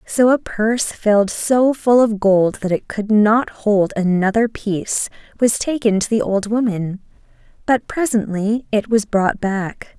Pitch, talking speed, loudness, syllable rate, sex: 215 Hz, 160 wpm, -17 LUFS, 4.1 syllables/s, female